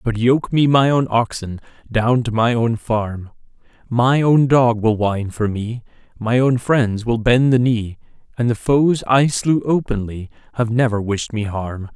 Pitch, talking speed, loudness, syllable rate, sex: 120 Hz, 180 wpm, -18 LUFS, 4.2 syllables/s, male